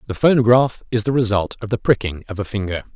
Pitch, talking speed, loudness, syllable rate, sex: 110 Hz, 225 wpm, -19 LUFS, 6.3 syllables/s, male